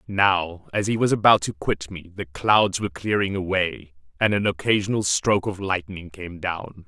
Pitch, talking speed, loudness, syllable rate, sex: 95 Hz, 185 wpm, -22 LUFS, 4.7 syllables/s, male